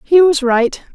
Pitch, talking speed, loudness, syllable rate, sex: 290 Hz, 190 wpm, -13 LUFS, 4.0 syllables/s, female